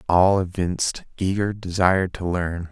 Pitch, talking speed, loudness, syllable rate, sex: 90 Hz, 135 wpm, -22 LUFS, 4.6 syllables/s, male